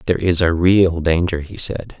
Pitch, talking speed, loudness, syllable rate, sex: 85 Hz, 210 wpm, -17 LUFS, 4.9 syllables/s, male